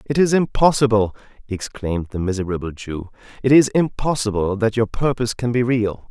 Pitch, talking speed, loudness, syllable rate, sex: 115 Hz, 145 wpm, -19 LUFS, 5.6 syllables/s, male